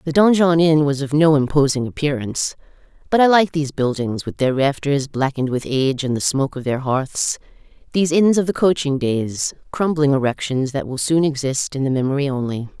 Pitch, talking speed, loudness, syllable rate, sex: 145 Hz, 190 wpm, -19 LUFS, 5.6 syllables/s, female